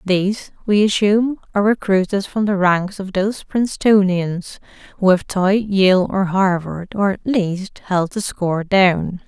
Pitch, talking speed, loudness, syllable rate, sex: 195 Hz, 155 wpm, -18 LUFS, 4.4 syllables/s, female